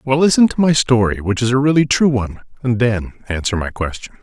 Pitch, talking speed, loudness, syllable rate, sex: 125 Hz, 225 wpm, -16 LUFS, 6.0 syllables/s, male